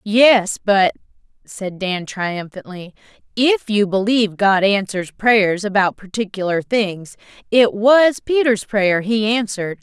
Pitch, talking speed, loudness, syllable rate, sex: 210 Hz, 120 wpm, -17 LUFS, 3.8 syllables/s, female